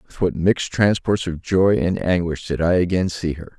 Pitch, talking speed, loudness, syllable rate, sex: 90 Hz, 215 wpm, -20 LUFS, 4.9 syllables/s, male